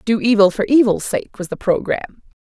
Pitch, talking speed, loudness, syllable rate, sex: 215 Hz, 195 wpm, -17 LUFS, 5.8 syllables/s, female